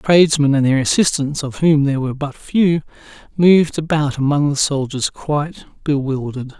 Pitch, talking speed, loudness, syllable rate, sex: 145 Hz, 155 wpm, -17 LUFS, 4.3 syllables/s, male